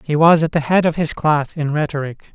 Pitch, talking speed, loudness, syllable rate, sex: 150 Hz, 255 wpm, -17 LUFS, 5.3 syllables/s, male